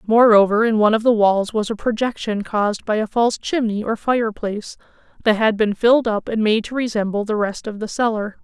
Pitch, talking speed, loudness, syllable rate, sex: 220 Hz, 215 wpm, -19 LUFS, 5.8 syllables/s, female